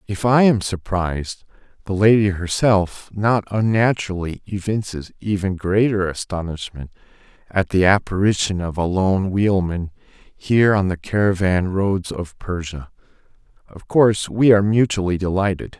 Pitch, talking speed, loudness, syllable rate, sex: 95 Hz, 125 wpm, -19 LUFS, 4.6 syllables/s, male